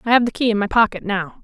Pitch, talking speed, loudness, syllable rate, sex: 215 Hz, 335 wpm, -18 LUFS, 7.0 syllables/s, female